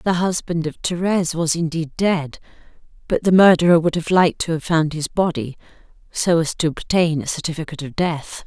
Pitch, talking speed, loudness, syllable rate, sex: 165 Hz, 185 wpm, -19 LUFS, 5.5 syllables/s, female